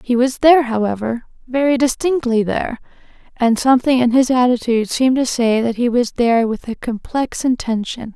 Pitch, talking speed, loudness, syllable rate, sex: 245 Hz, 170 wpm, -17 LUFS, 5.5 syllables/s, female